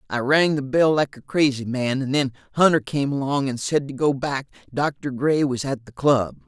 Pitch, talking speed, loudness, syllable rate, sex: 135 Hz, 220 wpm, -22 LUFS, 4.9 syllables/s, male